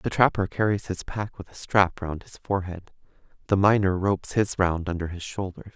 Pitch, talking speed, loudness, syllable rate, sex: 95 Hz, 200 wpm, -25 LUFS, 5.3 syllables/s, male